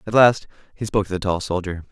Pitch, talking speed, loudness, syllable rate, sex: 95 Hz, 250 wpm, -20 LUFS, 6.8 syllables/s, male